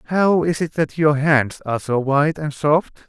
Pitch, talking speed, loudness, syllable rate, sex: 150 Hz, 215 wpm, -19 LUFS, 4.6 syllables/s, male